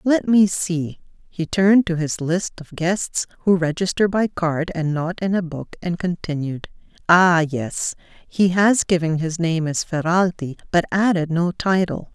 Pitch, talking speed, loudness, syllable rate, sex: 175 Hz, 170 wpm, -20 LUFS, 4.1 syllables/s, female